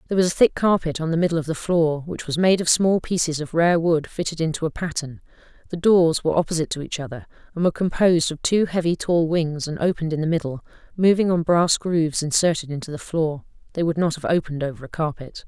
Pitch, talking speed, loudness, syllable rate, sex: 165 Hz, 230 wpm, -21 LUFS, 6.4 syllables/s, female